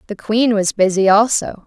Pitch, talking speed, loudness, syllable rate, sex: 210 Hz, 180 wpm, -15 LUFS, 4.7 syllables/s, female